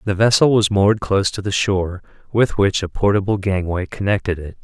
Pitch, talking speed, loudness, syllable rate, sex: 100 Hz, 195 wpm, -18 LUFS, 5.8 syllables/s, male